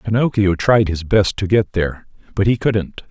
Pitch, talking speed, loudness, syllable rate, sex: 100 Hz, 195 wpm, -17 LUFS, 4.8 syllables/s, male